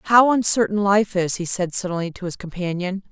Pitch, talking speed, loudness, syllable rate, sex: 190 Hz, 195 wpm, -20 LUFS, 5.3 syllables/s, female